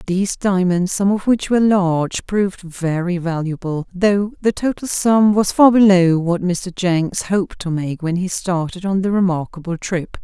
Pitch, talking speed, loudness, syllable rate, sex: 185 Hz, 175 wpm, -17 LUFS, 4.5 syllables/s, female